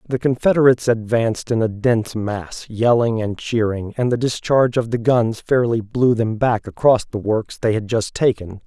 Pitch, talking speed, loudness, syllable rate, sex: 115 Hz, 185 wpm, -19 LUFS, 4.9 syllables/s, male